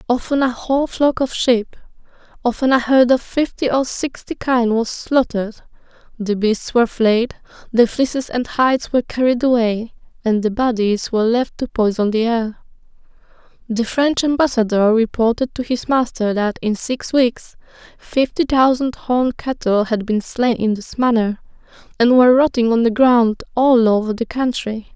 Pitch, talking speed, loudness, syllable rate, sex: 240 Hz, 160 wpm, -17 LUFS, 4.8 syllables/s, female